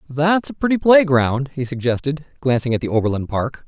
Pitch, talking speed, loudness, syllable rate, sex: 140 Hz, 180 wpm, -18 LUFS, 5.4 syllables/s, male